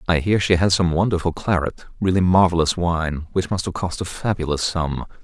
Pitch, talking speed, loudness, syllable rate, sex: 85 Hz, 195 wpm, -20 LUFS, 5.3 syllables/s, male